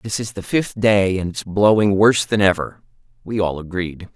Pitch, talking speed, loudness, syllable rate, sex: 100 Hz, 200 wpm, -18 LUFS, 4.9 syllables/s, male